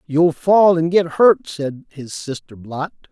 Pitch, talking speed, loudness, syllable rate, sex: 155 Hz, 175 wpm, -17 LUFS, 3.6 syllables/s, male